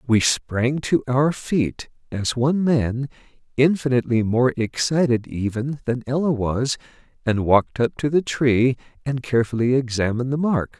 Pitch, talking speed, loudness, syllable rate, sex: 125 Hz, 145 wpm, -21 LUFS, 4.6 syllables/s, male